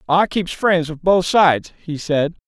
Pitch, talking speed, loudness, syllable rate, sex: 170 Hz, 195 wpm, -17 LUFS, 4.1 syllables/s, male